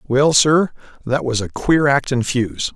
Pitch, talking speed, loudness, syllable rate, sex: 135 Hz, 175 wpm, -17 LUFS, 3.9 syllables/s, male